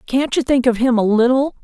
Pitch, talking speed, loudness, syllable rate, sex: 250 Hz, 255 wpm, -16 LUFS, 5.6 syllables/s, female